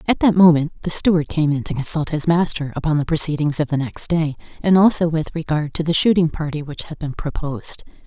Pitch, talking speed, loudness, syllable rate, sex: 160 Hz, 225 wpm, -19 LUFS, 5.9 syllables/s, female